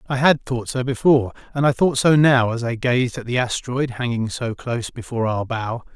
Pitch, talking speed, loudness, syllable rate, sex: 125 Hz, 220 wpm, -20 LUFS, 5.5 syllables/s, male